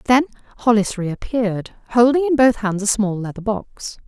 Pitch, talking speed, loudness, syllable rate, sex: 225 Hz, 160 wpm, -19 LUFS, 4.9 syllables/s, female